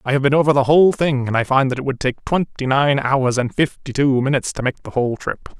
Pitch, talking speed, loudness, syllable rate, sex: 135 Hz, 280 wpm, -18 LUFS, 6.2 syllables/s, male